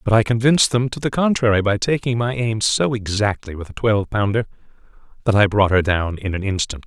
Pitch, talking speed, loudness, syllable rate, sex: 110 Hz, 220 wpm, -19 LUFS, 5.9 syllables/s, male